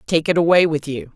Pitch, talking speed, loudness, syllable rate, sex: 160 Hz, 260 wpm, -17 LUFS, 5.8 syllables/s, female